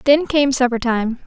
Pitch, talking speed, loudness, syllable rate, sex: 260 Hz, 190 wpm, -17 LUFS, 4.6 syllables/s, female